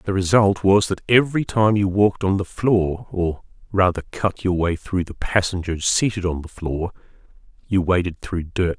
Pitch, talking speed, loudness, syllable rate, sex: 95 Hz, 185 wpm, -20 LUFS, 4.7 syllables/s, male